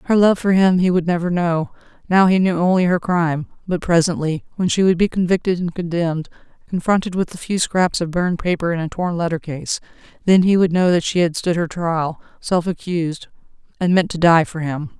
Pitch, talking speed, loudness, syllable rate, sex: 175 Hz, 215 wpm, -18 LUFS, 5.6 syllables/s, female